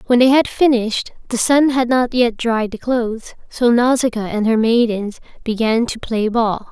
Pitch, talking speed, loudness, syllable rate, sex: 235 Hz, 190 wpm, -16 LUFS, 4.7 syllables/s, female